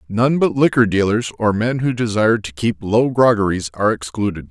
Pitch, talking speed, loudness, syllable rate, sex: 110 Hz, 185 wpm, -17 LUFS, 5.4 syllables/s, male